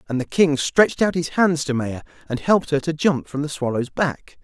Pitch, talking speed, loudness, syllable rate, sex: 150 Hz, 245 wpm, -21 LUFS, 5.3 syllables/s, male